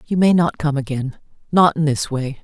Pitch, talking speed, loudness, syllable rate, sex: 150 Hz, 195 wpm, -18 LUFS, 5.2 syllables/s, female